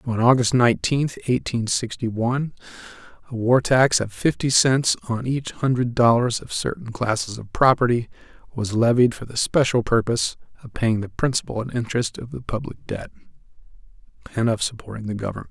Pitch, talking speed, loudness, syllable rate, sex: 120 Hz, 165 wpm, -21 LUFS, 5.4 syllables/s, male